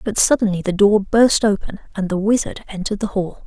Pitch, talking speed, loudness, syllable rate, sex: 205 Hz, 210 wpm, -18 LUFS, 5.8 syllables/s, female